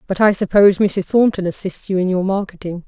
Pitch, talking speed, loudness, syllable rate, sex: 190 Hz, 210 wpm, -17 LUFS, 5.9 syllables/s, female